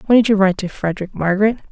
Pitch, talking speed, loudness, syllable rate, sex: 200 Hz, 245 wpm, -17 LUFS, 8.3 syllables/s, female